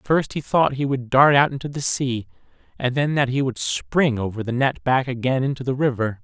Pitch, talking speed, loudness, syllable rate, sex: 130 Hz, 230 wpm, -21 LUFS, 5.2 syllables/s, male